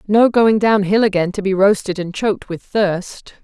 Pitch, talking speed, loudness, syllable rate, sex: 200 Hz, 210 wpm, -16 LUFS, 4.7 syllables/s, female